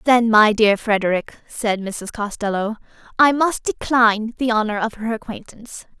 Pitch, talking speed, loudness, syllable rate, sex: 220 Hz, 150 wpm, -19 LUFS, 4.9 syllables/s, female